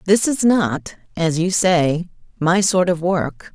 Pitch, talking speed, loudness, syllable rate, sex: 180 Hz, 170 wpm, -18 LUFS, 3.5 syllables/s, female